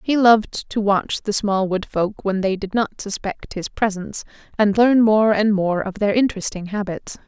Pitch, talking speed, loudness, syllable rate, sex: 205 Hz, 200 wpm, -20 LUFS, 4.8 syllables/s, female